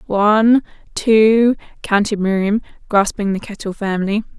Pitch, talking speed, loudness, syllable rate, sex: 210 Hz, 110 wpm, -16 LUFS, 4.3 syllables/s, female